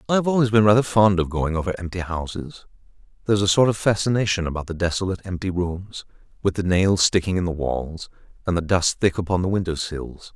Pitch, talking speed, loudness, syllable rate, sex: 95 Hz, 210 wpm, -21 LUFS, 6.1 syllables/s, male